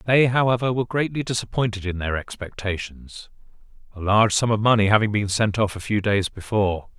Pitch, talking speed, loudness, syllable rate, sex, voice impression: 105 Hz, 180 wpm, -22 LUFS, 5.9 syllables/s, male, very masculine, adult-like, cool, calm, reassuring, elegant, slightly sweet